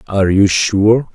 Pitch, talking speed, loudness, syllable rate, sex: 100 Hz, 160 wpm, -13 LUFS, 4.0 syllables/s, male